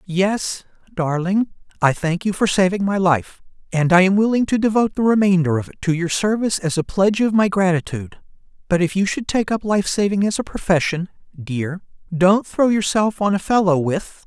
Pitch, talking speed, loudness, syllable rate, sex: 190 Hz, 200 wpm, -19 LUFS, 5.4 syllables/s, male